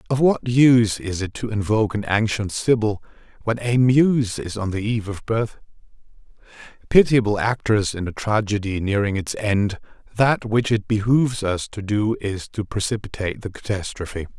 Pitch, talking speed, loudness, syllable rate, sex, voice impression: 110 Hz, 165 wpm, -21 LUFS, 5.0 syllables/s, male, very masculine, adult-like, slightly thick, cool, intellectual, slightly kind